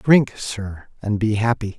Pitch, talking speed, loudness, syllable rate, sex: 110 Hz, 170 wpm, -21 LUFS, 3.8 syllables/s, male